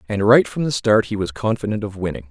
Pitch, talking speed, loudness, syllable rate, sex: 105 Hz, 260 wpm, -19 LUFS, 6.1 syllables/s, male